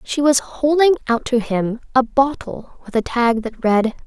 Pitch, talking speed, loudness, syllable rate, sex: 250 Hz, 190 wpm, -18 LUFS, 4.3 syllables/s, female